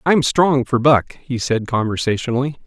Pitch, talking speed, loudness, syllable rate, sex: 130 Hz, 155 wpm, -18 LUFS, 4.9 syllables/s, male